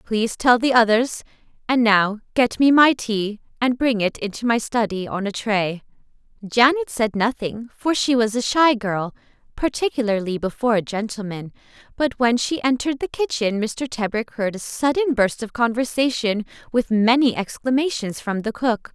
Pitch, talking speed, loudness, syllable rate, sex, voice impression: 230 Hz, 160 wpm, -20 LUFS, 4.8 syllables/s, female, feminine, adult-like, tensed, powerful, bright, clear, fluent, nasal, intellectual, calm, friendly, reassuring, slightly sweet, lively